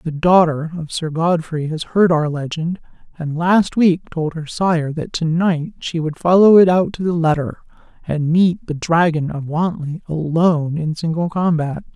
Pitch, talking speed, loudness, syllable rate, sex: 165 Hz, 180 wpm, -17 LUFS, 4.4 syllables/s, female